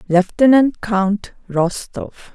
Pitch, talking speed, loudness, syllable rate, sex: 210 Hz, 75 wpm, -17 LUFS, 3.3 syllables/s, female